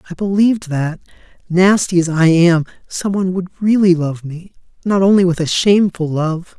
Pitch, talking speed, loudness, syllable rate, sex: 180 Hz, 175 wpm, -15 LUFS, 5.1 syllables/s, male